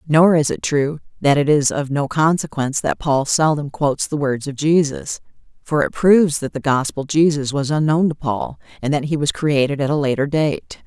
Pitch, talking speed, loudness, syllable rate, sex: 145 Hz, 210 wpm, -18 LUFS, 5.1 syllables/s, female